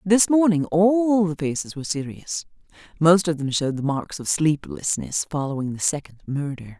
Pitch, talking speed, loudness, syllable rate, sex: 160 Hz, 170 wpm, -22 LUFS, 5.0 syllables/s, female